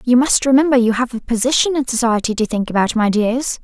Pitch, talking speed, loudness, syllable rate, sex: 240 Hz, 230 wpm, -16 LUFS, 6.0 syllables/s, female